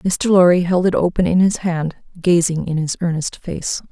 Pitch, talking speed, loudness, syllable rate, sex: 175 Hz, 200 wpm, -17 LUFS, 4.8 syllables/s, female